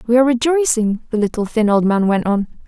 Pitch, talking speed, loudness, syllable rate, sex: 230 Hz, 225 wpm, -16 LUFS, 6.1 syllables/s, female